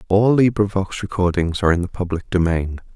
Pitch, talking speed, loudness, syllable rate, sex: 95 Hz, 160 wpm, -19 LUFS, 5.7 syllables/s, male